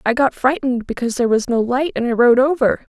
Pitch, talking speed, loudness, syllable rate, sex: 250 Hz, 245 wpm, -17 LUFS, 6.9 syllables/s, female